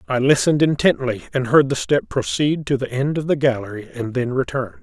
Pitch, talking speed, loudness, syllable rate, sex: 135 Hz, 210 wpm, -19 LUFS, 5.6 syllables/s, male